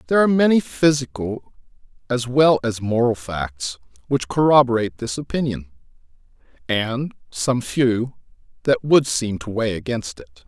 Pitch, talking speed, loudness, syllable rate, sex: 125 Hz, 130 wpm, -20 LUFS, 4.7 syllables/s, male